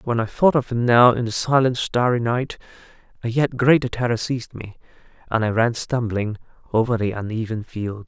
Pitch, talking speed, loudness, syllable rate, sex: 115 Hz, 185 wpm, -20 LUFS, 5.3 syllables/s, male